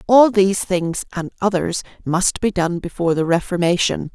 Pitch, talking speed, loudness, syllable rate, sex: 180 Hz, 130 wpm, -19 LUFS, 5.0 syllables/s, female